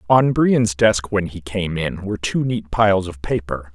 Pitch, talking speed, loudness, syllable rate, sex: 100 Hz, 210 wpm, -19 LUFS, 4.5 syllables/s, male